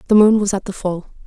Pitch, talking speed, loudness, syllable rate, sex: 200 Hz, 285 wpm, -17 LUFS, 6.7 syllables/s, female